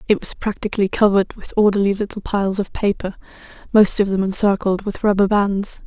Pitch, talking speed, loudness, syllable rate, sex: 200 Hz, 175 wpm, -18 LUFS, 5.9 syllables/s, female